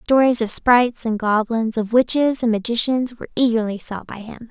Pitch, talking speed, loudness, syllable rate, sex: 230 Hz, 185 wpm, -19 LUFS, 5.2 syllables/s, female